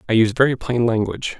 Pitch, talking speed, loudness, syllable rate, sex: 120 Hz, 215 wpm, -19 LUFS, 7.4 syllables/s, male